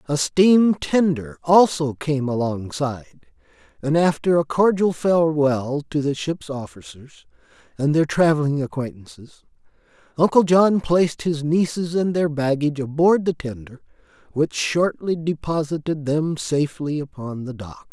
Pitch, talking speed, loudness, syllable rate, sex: 150 Hz, 125 wpm, -20 LUFS, 4.5 syllables/s, male